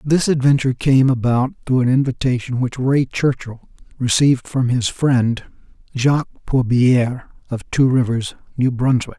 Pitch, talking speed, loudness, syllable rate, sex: 130 Hz, 135 wpm, -18 LUFS, 4.7 syllables/s, male